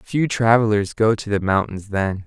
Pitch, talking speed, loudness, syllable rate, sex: 105 Hz, 185 wpm, -19 LUFS, 4.5 syllables/s, male